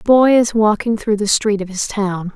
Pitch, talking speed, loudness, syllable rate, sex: 210 Hz, 255 wpm, -16 LUFS, 4.8 syllables/s, female